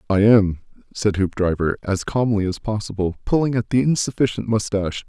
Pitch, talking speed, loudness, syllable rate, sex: 105 Hz, 155 wpm, -20 LUFS, 5.4 syllables/s, male